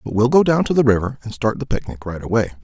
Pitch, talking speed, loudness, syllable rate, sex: 120 Hz, 295 wpm, -19 LUFS, 6.8 syllables/s, male